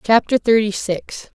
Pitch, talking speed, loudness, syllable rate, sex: 215 Hz, 130 wpm, -18 LUFS, 4.1 syllables/s, female